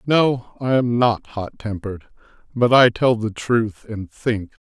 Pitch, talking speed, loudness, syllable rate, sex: 115 Hz, 165 wpm, -19 LUFS, 3.9 syllables/s, male